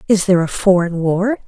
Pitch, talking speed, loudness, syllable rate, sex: 190 Hz, 205 wpm, -15 LUFS, 5.6 syllables/s, female